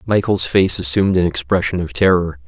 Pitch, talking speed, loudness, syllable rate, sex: 90 Hz, 170 wpm, -16 LUFS, 5.6 syllables/s, male